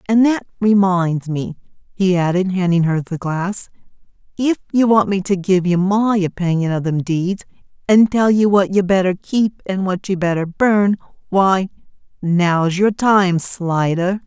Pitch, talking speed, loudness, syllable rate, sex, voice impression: 190 Hz, 165 wpm, -17 LUFS, 4.1 syllables/s, female, feminine, slightly gender-neutral, slightly young, adult-like, slightly thin, tensed, bright, soft, very clear, very fluent, cool, very intellectual, refreshing, sincere, very calm, friendly, reassuring, slightly elegant, sweet, very kind